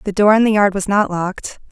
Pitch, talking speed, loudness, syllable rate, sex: 200 Hz, 280 wpm, -15 LUFS, 5.9 syllables/s, female